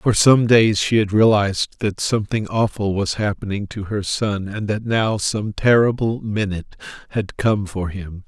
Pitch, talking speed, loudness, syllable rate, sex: 105 Hz, 175 wpm, -19 LUFS, 4.5 syllables/s, male